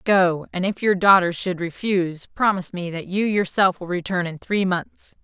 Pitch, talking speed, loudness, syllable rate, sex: 185 Hz, 195 wpm, -21 LUFS, 4.9 syllables/s, female